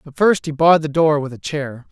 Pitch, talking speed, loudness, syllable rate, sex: 150 Hz, 280 wpm, -17 LUFS, 5.6 syllables/s, male